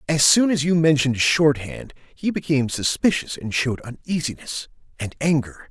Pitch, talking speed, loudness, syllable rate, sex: 145 Hz, 145 wpm, -21 LUFS, 5.1 syllables/s, male